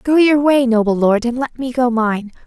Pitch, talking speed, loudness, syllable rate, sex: 245 Hz, 245 wpm, -15 LUFS, 4.9 syllables/s, female